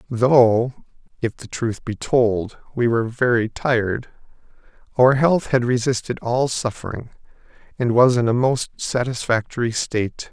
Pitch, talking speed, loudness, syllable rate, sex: 120 Hz, 135 wpm, -20 LUFS, 4.4 syllables/s, male